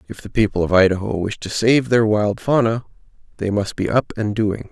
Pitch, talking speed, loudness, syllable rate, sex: 105 Hz, 215 wpm, -19 LUFS, 5.3 syllables/s, male